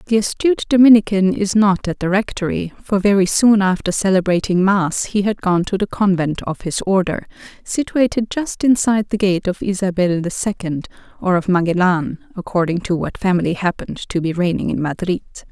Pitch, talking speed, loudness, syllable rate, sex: 190 Hz, 175 wpm, -17 LUFS, 5.4 syllables/s, female